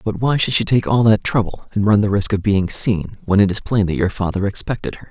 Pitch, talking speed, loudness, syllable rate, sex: 105 Hz, 280 wpm, -17 LUFS, 5.8 syllables/s, male